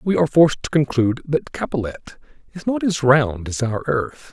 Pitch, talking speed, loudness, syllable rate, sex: 140 Hz, 195 wpm, -20 LUFS, 5.8 syllables/s, male